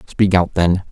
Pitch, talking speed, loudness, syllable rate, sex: 90 Hz, 200 wpm, -16 LUFS, 4.1 syllables/s, male